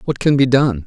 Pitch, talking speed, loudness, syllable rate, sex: 125 Hz, 280 wpm, -15 LUFS, 5.3 syllables/s, male